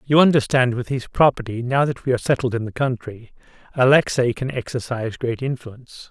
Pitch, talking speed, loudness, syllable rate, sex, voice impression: 125 Hz, 175 wpm, -20 LUFS, 5.8 syllables/s, male, very masculine, adult-like, middle-aged, thick, slightly tensed, slightly powerful, slightly dark, slightly soft, slightly muffled, fluent, slightly raspy, cool, very intellectual, slightly refreshing, sincere, calm, very friendly, reassuring, elegant, sweet, slightly lively, kind, slightly modest